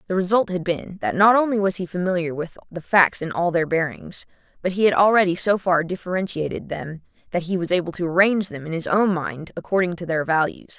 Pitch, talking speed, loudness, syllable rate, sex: 180 Hz, 225 wpm, -21 LUFS, 5.8 syllables/s, female